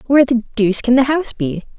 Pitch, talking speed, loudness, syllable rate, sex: 240 Hz, 235 wpm, -16 LUFS, 7.0 syllables/s, female